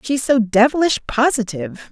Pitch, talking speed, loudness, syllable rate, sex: 240 Hz, 125 wpm, -17 LUFS, 5.0 syllables/s, female